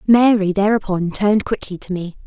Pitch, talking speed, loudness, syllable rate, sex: 200 Hz, 160 wpm, -17 LUFS, 5.3 syllables/s, female